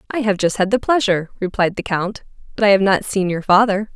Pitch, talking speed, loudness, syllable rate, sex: 200 Hz, 245 wpm, -17 LUFS, 6.0 syllables/s, female